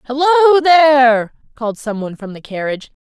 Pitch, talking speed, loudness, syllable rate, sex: 255 Hz, 140 wpm, -13 LUFS, 6.5 syllables/s, female